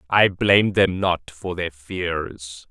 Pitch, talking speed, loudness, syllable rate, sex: 90 Hz, 155 wpm, -21 LUFS, 3.2 syllables/s, male